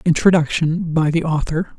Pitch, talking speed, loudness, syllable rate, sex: 160 Hz, 135 wpm, -18 LUFS, 4.8 syllables/s, male